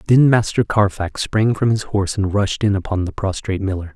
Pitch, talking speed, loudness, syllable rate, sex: 100 Hz, 210 wpm, -18 LUFS, 5.6 syllables/s, male